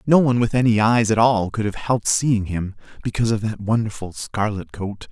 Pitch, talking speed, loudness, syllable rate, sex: 110 Hz, 210 wpm, -20 LUFS, 5.6 syllables/s, male